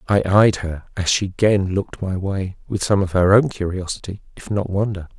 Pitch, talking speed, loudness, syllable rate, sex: 95 Hz, 210 wpm, -20 LUFS, 5.2 syllables/s, male